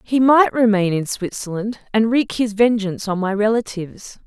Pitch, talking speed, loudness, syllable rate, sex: 215 Hz, 170 wpm, -18 LUFS, 5.0 syllables/s, female